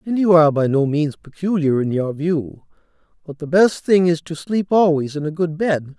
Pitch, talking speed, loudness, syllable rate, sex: 160 Hz, 220 wpm, -18 LUFS, 4.9 syllables/s, male